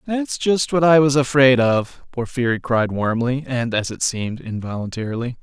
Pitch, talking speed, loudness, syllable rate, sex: 130 Hz, 165 wpm, -19 LUFS, 4.9 syllables/s, male